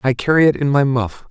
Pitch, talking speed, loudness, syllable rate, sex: 130 Hz, 275 wpm, -16 LUFS, 5.9 syllables/s, male